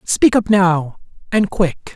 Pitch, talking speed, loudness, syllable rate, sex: 190 Hz, 155 wpm, -16 LUFS, 3.3 syllables/s, male